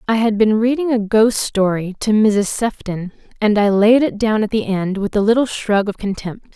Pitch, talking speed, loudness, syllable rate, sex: 215 Hz, 220 wpm, -17 LUFS, 4.8 syllables/s, female